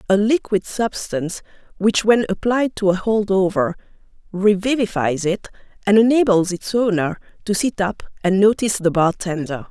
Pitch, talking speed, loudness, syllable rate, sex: 200 Hz, 140 wpm, -19 LUFS, 4.9 syllables/s, female